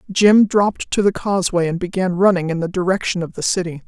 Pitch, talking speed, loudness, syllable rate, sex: 185 Hz, 215 wpm, -18 LUFS, 6.0 syllables/s, female